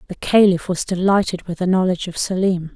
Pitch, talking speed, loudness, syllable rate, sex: 185 Hz, 195 wpm, -18 LUFS, 5.9 syllables/s, female